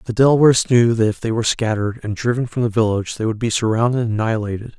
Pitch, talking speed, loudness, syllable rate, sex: 115 Hz, 240 wpm, -18 LUFS, 7.4 syllables/s, male